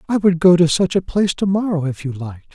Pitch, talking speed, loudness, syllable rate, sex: 170 Hz, 285 wpm, -17 LUFS, 6.7 syllables/s, male